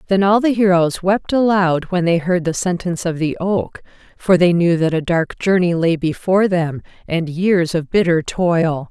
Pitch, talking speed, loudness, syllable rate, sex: 175 Hz, 195 wpm, -17 LUFS, 4.6 syllables/s, female